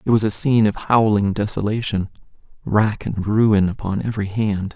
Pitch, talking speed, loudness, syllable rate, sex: 105 Hz, 165 wpm, -19 LUFS, 5.1 syllables/s, male